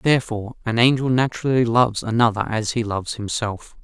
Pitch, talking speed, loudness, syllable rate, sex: 115 Hz, 155 wpm, -20 LUFS, 6.0 syllables/s, male